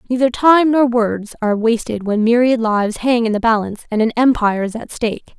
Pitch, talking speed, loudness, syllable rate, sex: 230 Hz, 210 wpm, -16 LUFS, 5.9 syllables/s, female